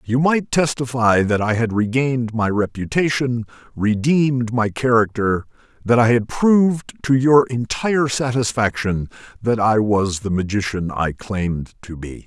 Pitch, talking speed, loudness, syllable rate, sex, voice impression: 115 Hz, 135 wpm, -19 LUFS, 4.5 syllables/s, male, masculine, middle-aged, relaxed, powerful, slightly hard, muffled, raspy, cool, intellectual, calm, mature, wild, lively, strict, intense, sharp